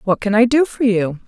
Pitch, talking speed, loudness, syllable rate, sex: 225 Hz, 285 wpm, -16 LUFS, 5.3 syllables/s, female